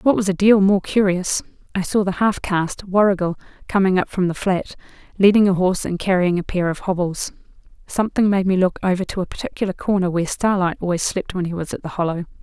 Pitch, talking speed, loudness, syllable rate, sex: 185 Hz, 215 wpm, -20 LUFS, 6.1 syllables/s, female